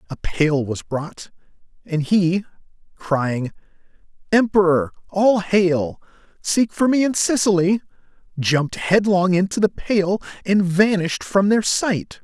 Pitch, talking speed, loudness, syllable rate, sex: 185 Hz, 125 wpm, -19 LUFS, 3.9 syllables/s, male